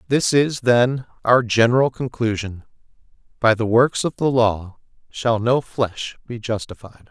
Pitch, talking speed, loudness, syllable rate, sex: 115 Hz, 145 wpm, -19 LUFS, 4.1 syllables/s, male